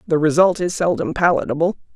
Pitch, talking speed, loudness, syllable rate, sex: 170 Hz, 155 wpm, -18 LUFS, 6.1 syllables/s, female